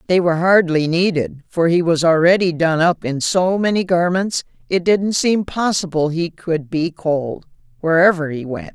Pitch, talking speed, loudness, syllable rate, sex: 170 Hz, 170 wpm, -17 LUFS, 4.5 syllables/s, female